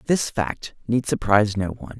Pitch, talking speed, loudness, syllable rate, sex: 110 Hz, 180 wpm, -23 LUFS, 4.9 syllables/s, male